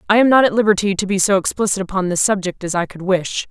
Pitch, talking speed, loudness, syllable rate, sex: 195 Hz, 275 wpm, -17 LUFS, 6.7 syllables/s, female